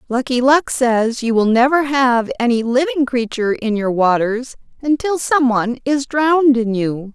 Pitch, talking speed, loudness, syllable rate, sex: 250 Hz, 160 wpm, -16 LUFS, 4.6 syllables/s, female